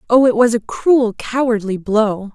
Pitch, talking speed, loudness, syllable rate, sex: 230 Hz, 180 wpm, -16 LUFS, 4.2 syllables/s, female